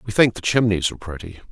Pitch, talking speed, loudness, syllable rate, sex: 100 Hz, 235 wpm, -19 LUFS, 6.8 syllables/s, male